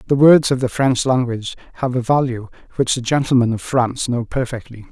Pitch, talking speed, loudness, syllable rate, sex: 125 Hz, 195 wpm, -17 LUFS, 5.8 syllables/s, male